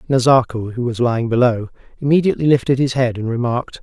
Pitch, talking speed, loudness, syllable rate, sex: 125 Hz, 170 wpm, -17 LUFS, 6.6 syllables/s, male